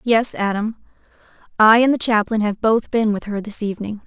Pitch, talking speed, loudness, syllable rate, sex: 215 Hz, 190 wpm, -18 LUFS, 5.4 syllables/s, female